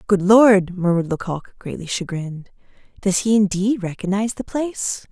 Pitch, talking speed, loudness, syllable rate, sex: 195 Hz, 140 wpm, -19 LUFS, 5.2 syllables/s, female